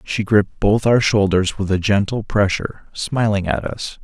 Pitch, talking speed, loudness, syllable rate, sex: 100 Hz, 180 wpm, -18 LUFS, 4.7 syllables/s, male